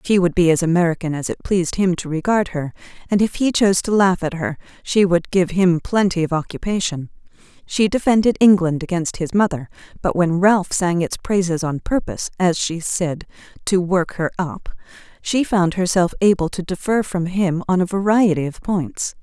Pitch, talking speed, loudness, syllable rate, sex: 180 Hz, 190 wpm, -19 LUFS, 5.2 syllables/s, female